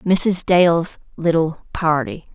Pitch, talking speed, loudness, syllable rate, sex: 165 Hz, 105 wpm, -18 LUFS, 3.7 syllables/s, female